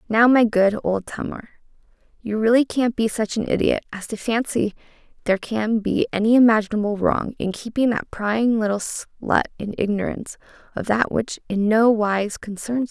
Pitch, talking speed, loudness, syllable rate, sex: 220 Hz, 170 wpm, -21 LUFS, 5.0 syllables/s, female